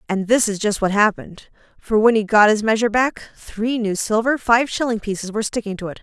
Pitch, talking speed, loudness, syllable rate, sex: 215 Hz, 230 wpm, -18 LUFS, 5.9 syllables/s, female